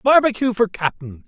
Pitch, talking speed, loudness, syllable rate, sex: 210 Hz, 140 wpm, -19 LUFS, 4.3 syllables/s, male